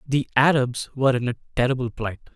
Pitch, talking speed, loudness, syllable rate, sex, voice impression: 130 Hz, 180 wpm, -22 LUFS, 6.3 syllables/s, male, very masculine, very adult-like, slightly thick, slightly refreshing, slightly sincere